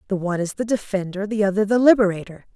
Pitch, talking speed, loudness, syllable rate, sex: 200 Hz, 210 wpm, -20 LUFS, 7.0 syllables/s, female